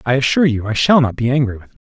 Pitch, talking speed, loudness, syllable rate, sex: 125 Hz, 320 wpm, -15 LUFS, 7.8 syllables/s, male